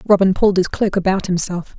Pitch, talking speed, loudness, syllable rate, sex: 190 Hz, 200 wpm, -17 LUFS, 6.0 syllables/s, female